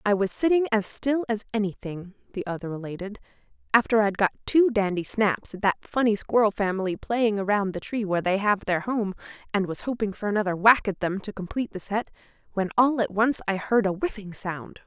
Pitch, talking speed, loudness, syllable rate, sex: 210 Hz, 205 wpm, -25 LUFS, 5.7 syllables/s, female